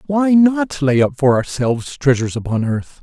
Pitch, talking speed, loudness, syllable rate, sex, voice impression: 145 Hz, 180 wpm, -16 LUFS, 4.9 syllables/s, male, very masculine, very adult-like, very middle-aged, very thick, tensed, slightly powerful, slightly bright, hard, slightly clear, slightly fluent, slightly raspy, very cool, slightly intellectual, sincere, slightly calm, very mature, friendly, slightly reassuring, very unique, very wild, lively, strict, intense